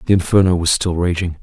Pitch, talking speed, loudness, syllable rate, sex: 90 Hz, 210 wpm, -16 LUFS, 6.5 syllables/s, male